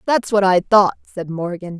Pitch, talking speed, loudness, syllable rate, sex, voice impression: 190 Hz, 200 wpm, -17 LUFS, 4.8 syllables/s, female, feminine, adult-like, tensed, slightly intellectual, slightly unique, slightly intense